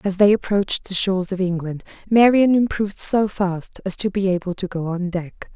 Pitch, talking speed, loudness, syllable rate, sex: 190 Hz, 205 wpm, -19 LUFS, 5.3 syllables/s, female